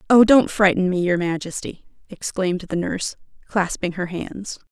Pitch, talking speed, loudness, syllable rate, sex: 185 Hz, 155 wpm, -21 LUFS, 4.9 syllables/s, female